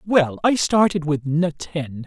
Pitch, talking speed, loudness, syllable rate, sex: 165 Hz, 175 wpm, -20 LUFS, 3.7 syllables/s, male